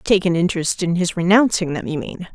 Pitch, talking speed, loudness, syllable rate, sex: 175 Hz, 230 wpm, -18 LUFS, 5.8 syllables/s, female